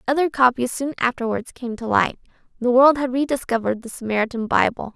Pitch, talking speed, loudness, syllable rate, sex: 250 Hz, 170 wpm, -20 LUFS, 6.0 syllables/s, female